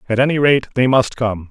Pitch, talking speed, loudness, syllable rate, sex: 120 Hz, 240 wpm, -16 LUFS, 5.6 syllables/s, male